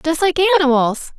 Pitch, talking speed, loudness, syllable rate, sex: 285 Hz, 150 wpm, -15 LUFS, 5.8 syllables/s, female